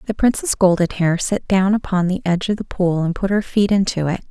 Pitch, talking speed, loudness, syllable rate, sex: 190 Hz, 235 wpm, -18 LUFS, 5.7 syllables/s, female